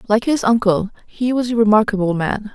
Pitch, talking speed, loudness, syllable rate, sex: 220 Hz, 190 wpm, -17 LUFS, 5.4 syllables/s, female